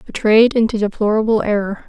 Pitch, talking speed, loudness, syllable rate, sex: 215 Hz, 130 wpm, -15 LUFS, 5.8 syllables/s, female